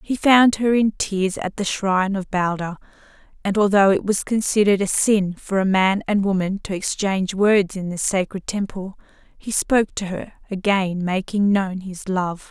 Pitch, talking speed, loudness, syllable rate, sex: 195 Hz, 180 wpm, -20 LUFS, 4.7 syllables/s, female